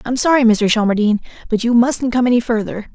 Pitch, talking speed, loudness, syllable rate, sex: 235 Hz, 205 wpm, -15 LUFS, 6.3 syllables/s, female